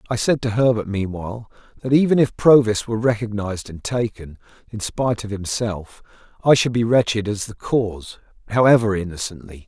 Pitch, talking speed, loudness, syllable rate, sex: 110 Hz, 160 wpm, -20 LUFS, 5.6 syllables/s, male